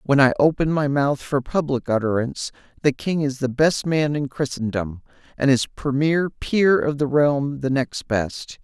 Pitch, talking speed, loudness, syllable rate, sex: 140 Hz, 180 wpm, -21 LUFS, 4.5 syllables/s, male